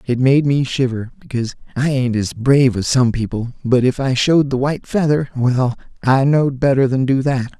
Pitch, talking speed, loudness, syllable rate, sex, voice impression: 130 Hz, 195 wpm, -17 LUFS, 5.3 syllables/s, male, masculine, adult-like, slightly raspy, slightly cool, slightly refreshing, sincere, friendly